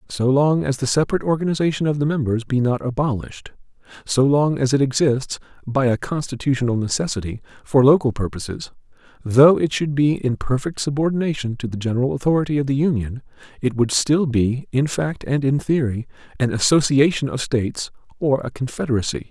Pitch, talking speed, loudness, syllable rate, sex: 135 Hz, 170 wpm, -20 LUFS, 5.8 syllables/s, male